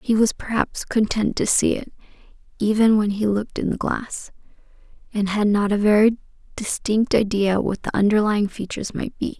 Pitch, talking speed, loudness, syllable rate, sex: 210 Hz, 170 wpm, -21 LUFS, 4.9 syllables/s, female